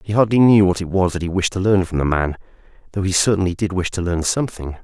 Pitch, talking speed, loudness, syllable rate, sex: 95 Hz, 275 wpm, -18 LUFS, 6.6 syllables/s, male